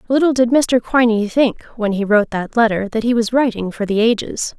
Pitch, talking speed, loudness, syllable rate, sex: 225 Hz, 220 wpm, -16 LUFS, 5.5 syllables/s, female